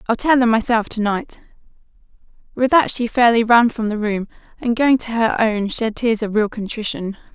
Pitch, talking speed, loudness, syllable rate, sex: 225 Hz, 195 wpm, -18 LUFS, 5.0 syllables/s, female